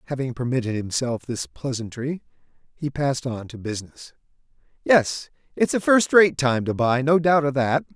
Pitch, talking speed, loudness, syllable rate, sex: 135 Hz, 160 wpm, -22 LUFS, 5.0 syllables/s, male